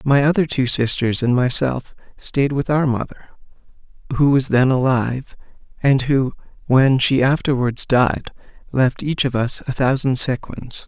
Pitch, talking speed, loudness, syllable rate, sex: 130 Hz, 150 wpm, -18 LUFS, 4.4 syllables/s, male